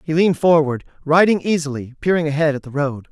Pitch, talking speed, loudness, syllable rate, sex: 155 Hz, 195 wpm, -18 LUFS, 6.2 syllables/s, male